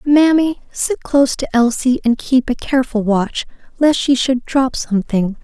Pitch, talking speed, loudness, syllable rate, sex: 255 Hz, 165 wpm, -16 LUFS, 4.5 syllables/s, female